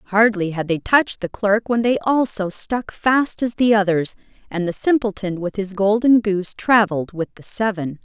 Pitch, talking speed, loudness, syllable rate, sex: 205 Hz, 185 wpm, -19 LUFS, 4.8 syllables/s, female